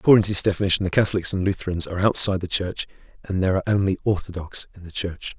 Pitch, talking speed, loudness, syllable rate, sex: 95 Hz, 225 wpm, -22 LUFS, 7.8 syllables/s, male